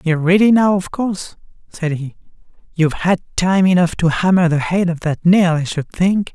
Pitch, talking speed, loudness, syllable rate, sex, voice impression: 175 Hz, 200 wpm, -16 LUFS, 5.2 syllables/s, male, very masculine, middle-aged, very old, thick, tensed, powerful, bright, soft, very muffled, very raspy, slightly cool, intellectual, very refreshing, very sincere, very calm, slightly mature, friendly, reassuring, very unique, slightly elegant, slightly sweet, lively, kind, slightly intense, slightly sharp, slightly modest